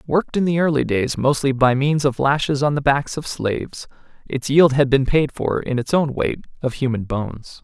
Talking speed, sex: 220 wpm, male